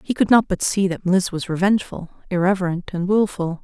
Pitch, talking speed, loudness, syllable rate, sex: 185 Hz, 200 wpm, -20 LUFS, 5.7 syllables/s, female